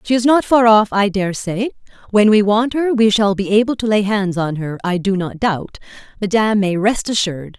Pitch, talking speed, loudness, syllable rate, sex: 205 Hz, 230 wpm, -16 LUFS, 5.2 syllables/s, female